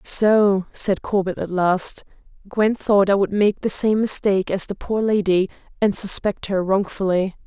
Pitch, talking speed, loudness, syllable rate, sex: 195 Hz, 170 wpm, -20 LUFS, 4.3 syllables/s, female